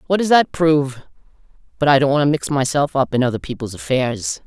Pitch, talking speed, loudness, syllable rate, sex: 140 Hz, 200 wpm, -18 LUFS, 6.0 syllables/s, female